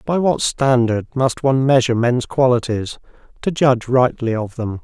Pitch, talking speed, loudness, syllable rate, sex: 125 Hz, 160 wpm, -17 LUFS, 5.0 syllables/s, male